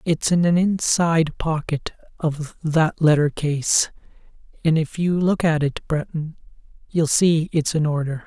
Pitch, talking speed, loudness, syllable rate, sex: 160 Hz, 150 wpm, -21 LUFS, 4.1 syllables/s, male